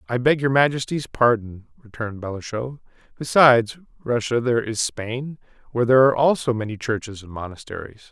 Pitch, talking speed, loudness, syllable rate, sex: 120 Hz, 150 wpm, -21 LUFS, 5.8 syllables/s, male